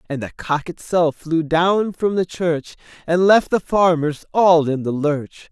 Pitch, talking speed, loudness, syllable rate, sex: 165 Hz, 185 wpm, -18 LUFS, 3.9 syllables/s, male